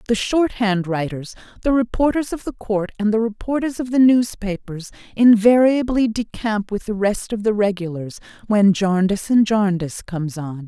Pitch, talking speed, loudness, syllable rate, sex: 210 Hz, 165 wpm, -19 LUFS, 4.9 syllables/s, female